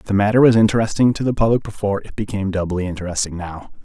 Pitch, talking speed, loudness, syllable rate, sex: 100 Hz, 220 wpm, -18 LUFS, 7.3 syllables/s, male